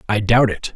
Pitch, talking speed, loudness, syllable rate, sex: 110 Hz, 235 wpm, -17 LUFS, 5.3 syllables/s, male